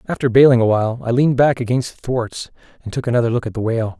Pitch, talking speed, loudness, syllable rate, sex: 120 Hz, 240 wpm, -17 LUFS, 7.1 syllables/s, male